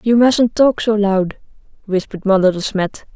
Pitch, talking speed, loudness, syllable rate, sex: 210 Hz, 170 wpm, -16 LUFS, 4.7 syllables/s, female